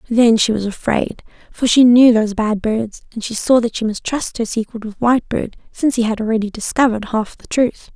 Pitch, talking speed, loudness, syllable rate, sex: 225 Hz, 220 wpm, -17 LUFS, 5.6 syllables/s, female